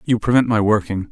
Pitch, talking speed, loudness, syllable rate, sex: 110 Hz, 215 wpm, -17 LUFS, 5.9 syllables/s, male